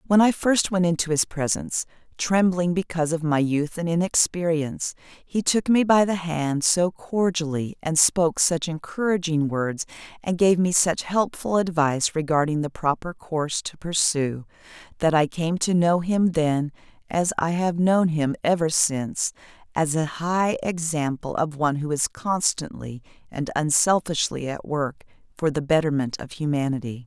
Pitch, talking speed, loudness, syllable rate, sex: 165 Hz, 155 wpm, -23 LUFS, 4.6 syllables/s, female